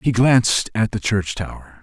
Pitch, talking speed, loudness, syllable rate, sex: 110 Hz, 195 wpm, -19 LUFS, 4.6 syllables/s, male